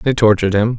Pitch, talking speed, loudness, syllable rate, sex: 110 Hz, 230 wpm, -14 LUFS, 6.7 syllables/s, male